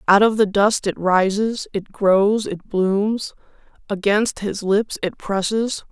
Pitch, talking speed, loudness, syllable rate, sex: 205 Hz, 150 wpm, -19 LUFS, 3.5 syllables/s, female